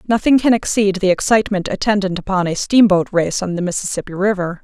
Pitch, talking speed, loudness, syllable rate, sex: 195 Hz, 180 wpm, -16 LUFS, 6.1 syllables/s, female